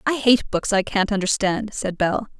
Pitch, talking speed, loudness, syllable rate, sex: 205 Hz, 200 wpm, -21 LUFS, 4.6 syllables/s, female